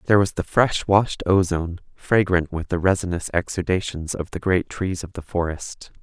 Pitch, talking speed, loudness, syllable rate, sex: 90 Hz, 180 wpm, -22 LUFS, 5.0 syllables/s, male